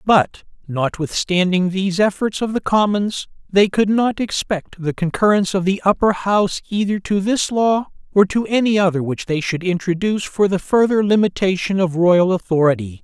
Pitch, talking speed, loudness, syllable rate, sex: 190 Hz, 165 wpm, -18 LUFS, 5.0 syllables/s, male